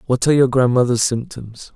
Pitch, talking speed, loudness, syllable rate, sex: 125 Hz, 170 wpm, -16 LUFS, 5.7 syllables/s, male